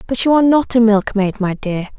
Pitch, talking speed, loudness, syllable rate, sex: 225 Hz, 240 wpm, -15 LUFS, 5.6 syllables/s, female